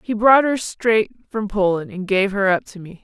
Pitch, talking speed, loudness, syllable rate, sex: 205 Hz, 235 wpm, -19 LUFS, 4.6 syllables/s, female